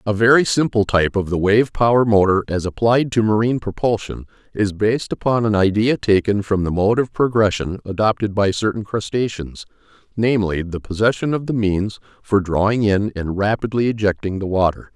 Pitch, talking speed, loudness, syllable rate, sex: 105 Hz, 175 wpm, -18 LUFS, 5.4 syllables/s, male